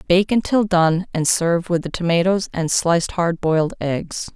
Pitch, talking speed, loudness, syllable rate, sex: 175 Hz, 180 wpm, -19 LUFS, 4.7 syllables/s, female